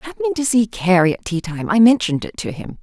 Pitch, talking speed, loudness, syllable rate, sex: 205 Hz, 235 wpm, -17 LUFS, 6.7 syllables/s, female